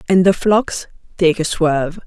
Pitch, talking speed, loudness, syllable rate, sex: 175 Hz, 175 wpm, -16 LUFS, 4.4 syllables/s, female